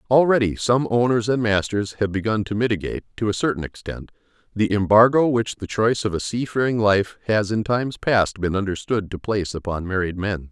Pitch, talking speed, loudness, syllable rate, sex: 105 Hz, 195 wpm, -21 LUFS, 5.6 syllables/s, male